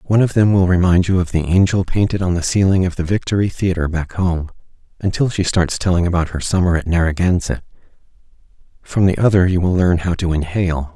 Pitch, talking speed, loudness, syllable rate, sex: 90 Hz, 205 wpm, -17 LUFS, 6.0 syllables/s, male